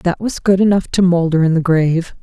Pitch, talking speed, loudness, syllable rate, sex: 175 Hz, 245 wpm, -14 LUFS, 5.6 syllables/s, female